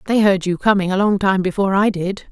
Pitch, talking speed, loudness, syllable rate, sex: 195 Hz, 260 wpm, -17 LUFS, 6.1 syllables/s, female